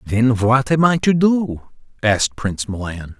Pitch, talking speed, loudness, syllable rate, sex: 120 Hz, 170 wpm, -17 LUFS, 4.3 syllables/s, male